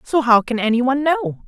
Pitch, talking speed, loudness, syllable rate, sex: 255 Hz, 245 wpm, -17 LUFS, 6.1 syllables/s, female